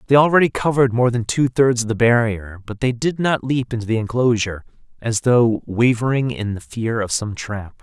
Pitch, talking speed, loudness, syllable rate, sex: 120 Hz, 205 wpm, -19 LUFS, 5.3 syllables/s, male